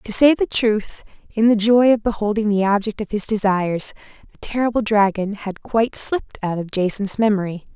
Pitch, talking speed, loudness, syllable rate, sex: 210 Hz, 185 wpm, -19 LUFS, 5.4 syllables/s, female